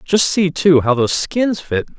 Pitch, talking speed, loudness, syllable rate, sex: 160 Hz, 210 wpm, -15 LUFS, 4.5 syllables/s, male